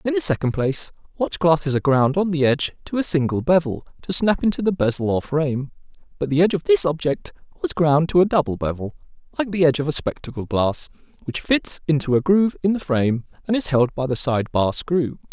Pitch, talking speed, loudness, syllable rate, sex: 155 Hz, 225 wpm, -20 LUFS, 6.1 syllables/s, male